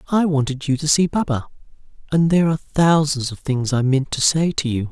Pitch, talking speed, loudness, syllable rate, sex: 145 Hz, 220 wpm, -19 LUFS, 5.6 syllables/s, male